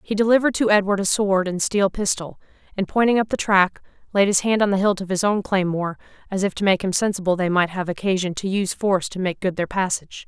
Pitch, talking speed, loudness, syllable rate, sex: 195 Hz, 245 wpm, -21 LUFS, 6.3 syllables/s, female